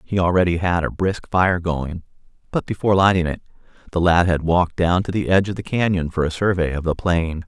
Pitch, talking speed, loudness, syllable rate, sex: 90 Hz, 225 wpm, -20 LUFS, 5.8 syllables/s, male